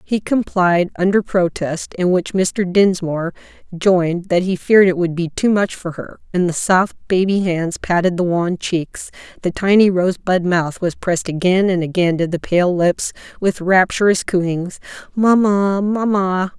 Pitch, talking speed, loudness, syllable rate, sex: 185 Hz, 165 wpm, -17 LUFS, 4.4 syllables/s, female